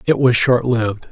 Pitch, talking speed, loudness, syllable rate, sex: 120 Hz, 160 wpm, -16 LUFS, 5.3 syllables/s, male